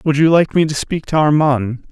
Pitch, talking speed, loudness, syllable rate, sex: 150 Hz, 250 wpm, -15 LUFS, 5.1 syllables/s, male